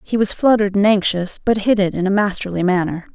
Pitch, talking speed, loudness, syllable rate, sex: 200 Hz, 230 wpm, -17 LUFS, 6.2 syllables/s, female